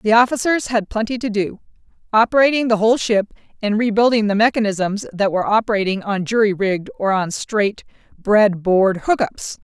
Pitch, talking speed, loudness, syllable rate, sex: 215 Hz, 160 wpm, -18 LUFS, 5.3 syllables/s, female